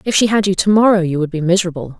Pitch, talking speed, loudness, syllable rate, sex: 185 Hz, 300 wpm, -15 LUFS, 7.4 syllables/s, female